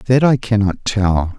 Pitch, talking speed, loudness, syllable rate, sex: 105 Hz, 175 wpm, -16 LUFS, 3.7 syllables/s, male